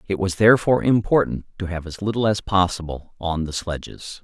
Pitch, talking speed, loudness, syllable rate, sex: 95 Hz, 185 wpm, -21 LUFS, 5.6 syllables/s, male